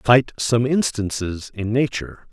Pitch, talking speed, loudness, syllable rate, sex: 115 Hz, 130 wpm, -21 LUFS, 4.4 syllables/s, male